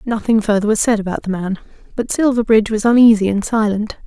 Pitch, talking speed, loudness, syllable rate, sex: 215 Hz, 190 wpm, -15 LUFS, 6.3 syllables/s, female